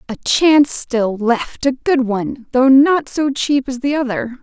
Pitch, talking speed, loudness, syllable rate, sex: 260 Hz, 190 wpm, -16 LUFS, 4.1 syllables/s, female